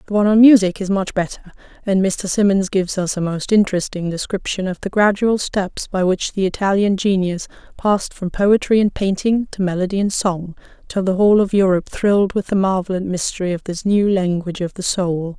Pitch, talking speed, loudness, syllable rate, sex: 190 Hz, 205 wpm, -18 LUFS, 5.7 syllables/s, female